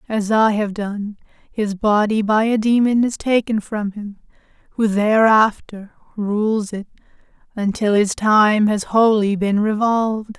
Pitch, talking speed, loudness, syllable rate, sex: 210 Hz, 140 wpm, -18 LUFS, 3.9 syllables/s, female